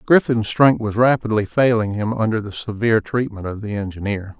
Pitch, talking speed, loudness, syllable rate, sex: 110 Hz, 180 wpm, -19 LUFS, 5.4 syllables/s, male